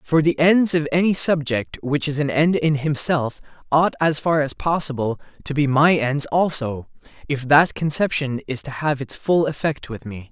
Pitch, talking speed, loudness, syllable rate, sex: 145 Hz, 190 wpm, -20 LUFS, 4.6 syllables/s, male